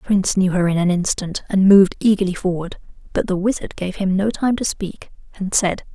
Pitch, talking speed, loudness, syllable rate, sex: 190 Hz, 220 wpm, -19 LUFS, 5.7 syllables/s, female